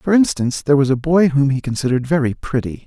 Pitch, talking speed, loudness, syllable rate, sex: 140 Hz, 230 wpm, -17 LUFS, 6.7 syllables/s, male